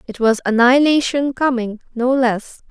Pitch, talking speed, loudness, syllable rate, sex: 250 Hz, 110 wpm, -16 LUFS, 4.8 syllables/s, female